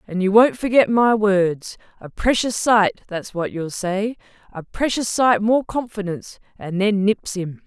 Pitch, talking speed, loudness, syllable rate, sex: 205 Hz, 165 wpm, -19 LUFS, 4.2 syllables/s, female